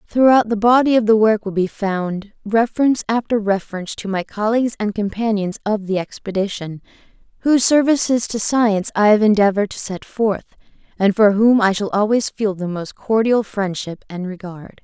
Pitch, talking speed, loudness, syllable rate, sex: 210 Hz, 175 wpm, -18 LUFS, 5.3 syllables/s, female